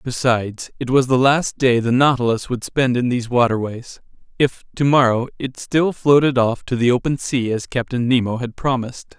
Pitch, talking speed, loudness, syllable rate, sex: 125 Hz, 185 wpm, -18 LUFS, 5.2 syllables/s, male